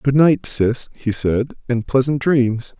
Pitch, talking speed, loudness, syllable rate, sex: 125 Hz, 170 wpm, -18 LUFS, 3.6 syllables/s, male